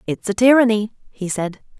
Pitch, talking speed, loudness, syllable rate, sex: 215 Hz, 165 wpm, -18 LUFS, 5.3 syllables/s, female